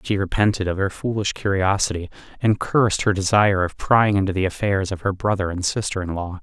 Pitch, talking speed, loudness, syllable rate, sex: 100 Hz, 205 wpm, -21 LUFS, 5.8 syllables/s, male